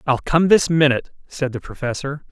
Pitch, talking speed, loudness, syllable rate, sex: 145 Hz, 180 wpm, -19 LUFS, 5.6 syllables/s, male